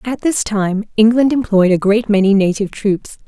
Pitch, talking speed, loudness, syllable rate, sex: 210 Hz, 185 wpm, -14 LUFS, 5.0 syllables/s, female